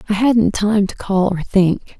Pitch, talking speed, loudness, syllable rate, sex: 200 Hz, 210 wpm, -16 LUFS, 4.2 syllables/s, female